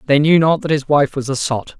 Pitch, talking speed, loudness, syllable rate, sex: 145 Hz, 300 wpm, -16 LUFS, 5.6 syllables/s, male